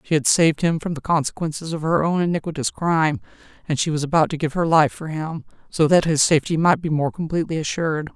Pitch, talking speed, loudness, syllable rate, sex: 160 Hz, 230 wpm, -20 LUFS, 6.4 syllables/s, female